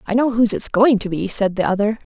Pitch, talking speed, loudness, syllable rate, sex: 215 Hz, 280 wpm, -17 LUFS, 6.4 syllables/s, female